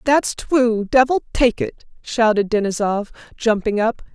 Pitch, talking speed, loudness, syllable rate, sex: 230 Hz, 130 wpm, -19 LUFS, 4.1 syllables/s, female